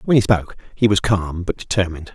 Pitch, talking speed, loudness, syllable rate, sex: 95 Hz, 225 wpm, -19 LUFS, 6.5 syllables/s, male